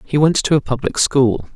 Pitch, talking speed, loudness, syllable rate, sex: 140 Hz, 230 wpm, -16 LUFS, 5.0 syllables/s, male